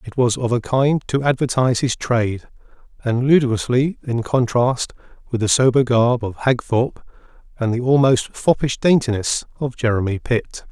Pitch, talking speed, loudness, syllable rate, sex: 125 Hz, 150 wpm, -19 LUFS, 4.9 syllables/s, male